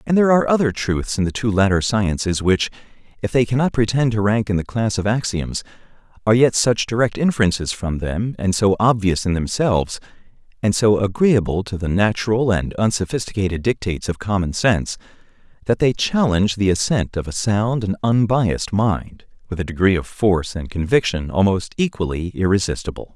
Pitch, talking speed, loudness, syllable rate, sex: 105 Hz, 175 wpm, -19 LUFS, 5.5 syllables/s, male